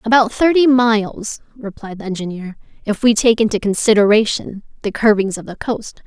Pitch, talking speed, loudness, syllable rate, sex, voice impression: 220 Hz, 160 wpm, -16 LUFS, 5.2 syllables/s, female, slightly feminine, slightly young, slightly tensed, sincere, slightly friendly